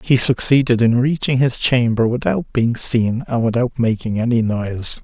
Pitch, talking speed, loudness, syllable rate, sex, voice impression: 120 Hz, 165 wpm, -17 LUFS, 4.7 syllables/s, male, very masculine, very adult-like, slightly old, very thick, very relaxed, slightly weak, slightly dark, slightly soft, muffled, slightly fluent, cool, very intellectual, sincere, very calm, very mature, slightly friendly, reassuring, slightly elegant, wild, slightly strict, modest